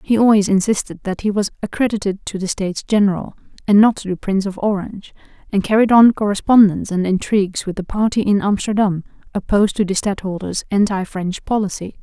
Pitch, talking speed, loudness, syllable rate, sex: 200 Hz, 180 wpm, -17 LUFS, 6.0 syllables/s, female